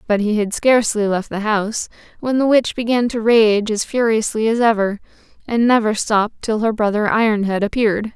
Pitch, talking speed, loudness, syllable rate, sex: 220 Hz, 185 wpm, -17 LUFS, 5.4 syllables/s, female